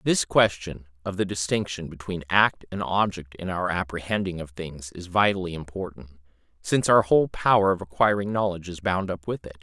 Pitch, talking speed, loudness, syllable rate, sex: 90 Hz, 180 wpm, -25 LUFS, 5.6 syllables/s, male